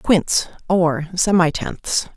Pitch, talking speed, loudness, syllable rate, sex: 175 Hz, 85 wpm, -19 LUFS, 2.6 syllables/s, female